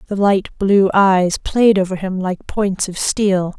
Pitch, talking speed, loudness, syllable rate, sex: 195 Hz, 185 wpm, -16 LUFS, 3.7 syllables/s, female